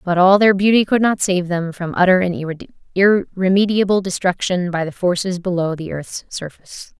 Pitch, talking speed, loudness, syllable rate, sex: 185 Hz, 170 wpm, -17 LUFS, 5.8 syllables/s, female